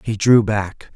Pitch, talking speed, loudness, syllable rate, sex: 105 Hz, 190 wpm, -16 LUFS, 3.6 syllables/s, male